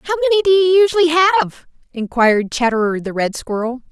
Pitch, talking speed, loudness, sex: 285 Hz, 170 wpm, -15 LUFS, female